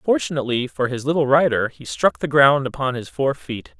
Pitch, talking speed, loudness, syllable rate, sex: 135 Hz, 205 wpm, -20 LUFS, 5.4 syllables/s, male